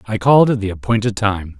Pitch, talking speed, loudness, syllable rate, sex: 110 Hz, 225 wpm, -16 LUFS, 6.0 syllables/s, male